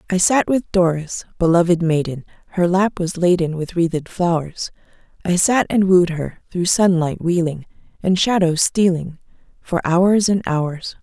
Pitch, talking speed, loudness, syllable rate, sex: 175 Hz, 150 wpm, -18 LUFS, 4.4 syllables/s, female